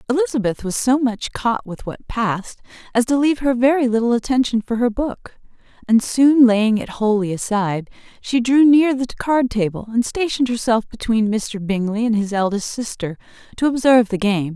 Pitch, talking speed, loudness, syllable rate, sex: 230 Hz, 180 wpm, -18 LUFS, 5.2 syllables/s, female